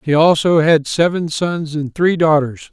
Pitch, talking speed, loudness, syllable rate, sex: 160 Hz, 175 wpm, -15 LUFS, 4.2 syllables/s, male